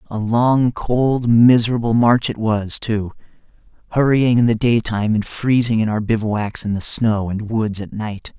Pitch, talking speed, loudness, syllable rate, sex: 115 Hz, 170 wpm, -17 LUFS, 4.3 syllables/s, male